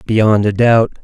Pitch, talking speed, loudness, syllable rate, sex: 110 Hz, 175 wpm, -12 LUFS, 3.7 syllables/s, male